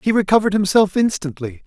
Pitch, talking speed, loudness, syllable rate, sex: 190 Hz, 145 wpm, -17 LUFS, 6.5 syllables/s, male